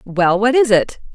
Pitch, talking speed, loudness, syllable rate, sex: 215 Hz, 210 wpm, -14 LUFS, 4.4 syllables/s, female